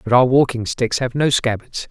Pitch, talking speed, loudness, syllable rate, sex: 125 Hz, 220 wpm, -18 LUFS, 5.0 syllables/s, male